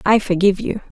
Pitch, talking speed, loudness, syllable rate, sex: 200 Hz, 180 wpm, -18 LUFS, 6.8 syllables/s, female